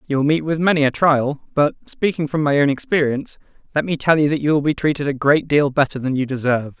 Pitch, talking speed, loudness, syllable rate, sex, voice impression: 145 Hz, 255 wpm, -18 LUFS, 6.3 syllables/s, male, masculine, adult-like, fluent, refreshing, slightly unique, slightly lively